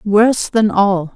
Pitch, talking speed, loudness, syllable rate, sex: 205 Hz, 155 wpm, -14 LUFS, 3.6 syllables/s, female